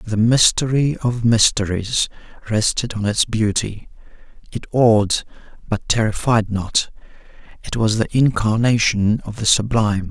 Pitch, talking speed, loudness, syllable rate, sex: 110 Hz, 115 wpm, -18 LUFS, 4.2 syllables/s, male